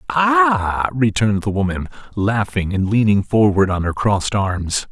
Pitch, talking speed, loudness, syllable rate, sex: 105 Hz, 145 wpm, -17 LUFS, 4.4 syllables/s, male